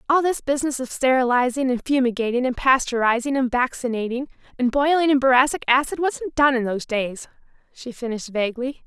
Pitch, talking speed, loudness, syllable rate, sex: 255 Hz, 160 wpm, -21 LUFS, 6.0 syllables/s, female